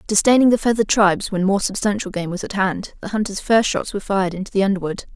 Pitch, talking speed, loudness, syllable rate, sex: 200 Hz, 235 wpm, -19 LUFS, 6.8 syllables/s, female